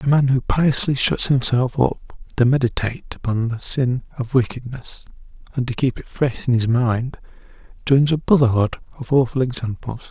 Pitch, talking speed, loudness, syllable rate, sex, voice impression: 125 Hz, 165 wpm, -20 LUFS, 5.0 syllables/s, male, masculine, adult-like, slightly muffled, slightly refreshing, sincere, calm, slightly sweet, kind